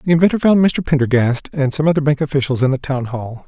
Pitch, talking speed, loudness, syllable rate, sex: 145 Hz, 240 wpm, -16 LUFS, 6.3 syllables/s, male